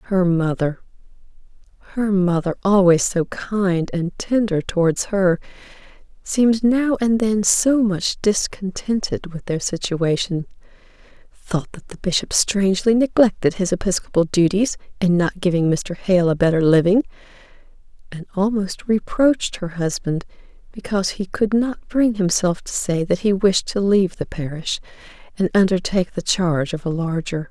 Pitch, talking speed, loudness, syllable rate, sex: 190 Hz, 135 wpm, -19 LUFS, 4.6 syllables/s, female